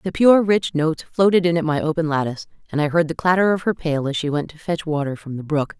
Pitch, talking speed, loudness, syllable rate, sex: 160 Hz, 280 wpm, -20 LUFS, 6.2 syllables/s, female